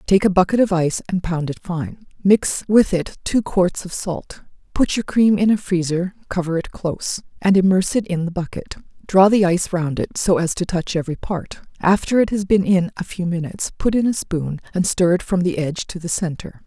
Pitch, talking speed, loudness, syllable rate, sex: 185 Hz, 225 wpm, -19 LUFS, 5.3 syllables/s, female